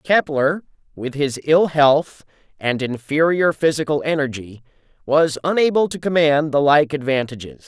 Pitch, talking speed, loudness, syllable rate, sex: 145 Hz, 125 wpm, -18 LUFS, 4.5 syllables/s, male